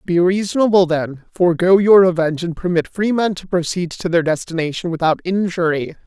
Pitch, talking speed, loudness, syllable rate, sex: 175 Hz, 170 wpm, -17 LUFS, 5.5 syllables/s, male